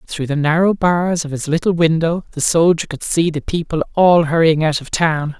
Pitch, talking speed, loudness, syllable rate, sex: 160 Hz, 210 wpm, -16 LUFS, 5.0 syllables/s, male